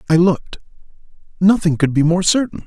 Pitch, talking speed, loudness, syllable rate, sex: 175 Hz, 160 wpm, -16 LUFS, 6.0 syllables/s, male